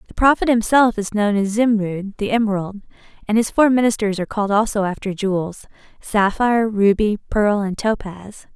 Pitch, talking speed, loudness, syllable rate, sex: 210 Hz, 140 wpm, -18 LUFS, 5.3 syllables/s, female